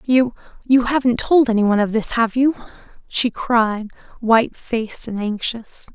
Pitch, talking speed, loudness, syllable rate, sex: 235 Hz, 140 wpm, -18 LUFS, 4.5 syllables/s, female